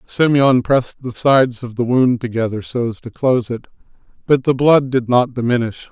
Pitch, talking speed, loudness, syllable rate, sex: 125 Hz, 195 wpm, -16 LUFS, 5.2 syllables/s, male